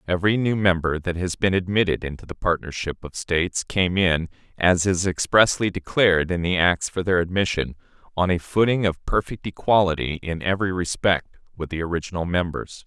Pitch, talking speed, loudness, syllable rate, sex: 90 Hz, 175 wpm, -22 LUFS, 5.4 syllables/s, male